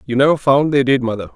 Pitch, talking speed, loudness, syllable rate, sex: 135 Hz, 265 wpm, -15 LUFS, 6.6 syllables/s, male